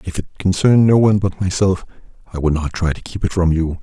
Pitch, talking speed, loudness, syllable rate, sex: 90 Hz, 250 wpm, -17 LUFS, 6.2 syllables/s, male